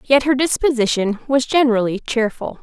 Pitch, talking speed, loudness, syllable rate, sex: 250 Hz, 135 wpm, -17 LUFS, 5.5 syllables/s, female